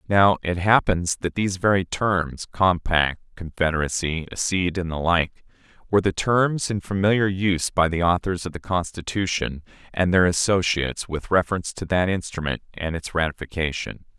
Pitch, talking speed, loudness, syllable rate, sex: 90 Hz, 145 wpm, -22 LUFS, 5.2 syllables/s, male